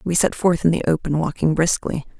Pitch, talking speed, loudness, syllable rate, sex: 165 Hz, 220 wpm, -20 LUFS, 5.7 syllables/s, female